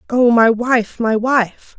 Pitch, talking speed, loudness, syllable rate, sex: 230 Hz, 170 wpm, -15 LUFS, 3.2 syllables/s, female